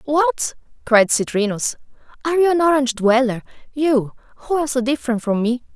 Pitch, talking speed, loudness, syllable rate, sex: 255 Hz, 155 wpm, -19 LUFS, 5.8 syllables/s, female